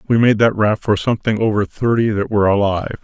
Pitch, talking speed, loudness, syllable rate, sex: 110 Hz, 215 wpm, -16 LUFS, 6.4 syllables/s, male